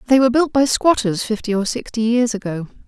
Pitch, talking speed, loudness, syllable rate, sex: 230 Hz, 210 wpm, -18 LUFS, 6.0 syllables/s, female